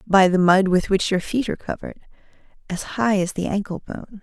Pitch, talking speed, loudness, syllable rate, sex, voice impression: 190 Hz, 215 wpm, -21 LUFS, 5.7 syllables/s, female, feminine, adult-like, slightly fluent, slightly sincere, slightly friendly, elegant